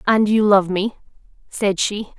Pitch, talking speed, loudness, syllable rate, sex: 205 Hz, 165 wpm, -18 LUFS, 4.1 syllables/s, female